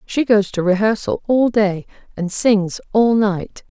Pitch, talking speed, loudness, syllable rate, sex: 205 Hz, 160 wpm, -17 LUFS, 3.9 syllables/s, female